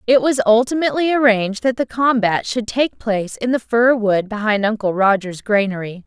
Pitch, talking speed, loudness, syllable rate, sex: 225 Hz, 180 wpm, -17 LUFS, 5.3 syllables/s, female